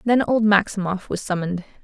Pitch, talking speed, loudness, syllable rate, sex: 200 Hz, 165 wpm, -21 LUFS, 5.7 syllables/s, female